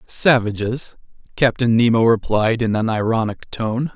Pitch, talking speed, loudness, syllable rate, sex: 115 Hz, 120 wpm, -18 LUFS, 4.4 syllables/s, male